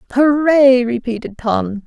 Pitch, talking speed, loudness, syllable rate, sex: 250 Hz, 95 wpm, -15 LUFS, 3.9 syllables/s, female